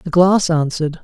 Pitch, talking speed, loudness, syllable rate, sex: 165 Hz, 175 wpm, -15 LUFS, 5.1 syllables/s, male